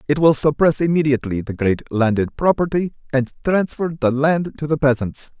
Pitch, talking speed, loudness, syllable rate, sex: 140 Hz, 165 wpm, -19 LUFS, 5.3 syllables/s, male